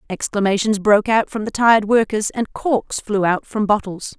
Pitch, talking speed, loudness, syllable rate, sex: 210 Hz, 185 wpm, -18 LUFS, 5.0 syllables/s, female